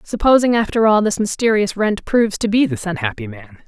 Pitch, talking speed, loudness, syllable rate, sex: 220 Hz, 195 wpm, -17 LUFS, 5.7 syllables/s, female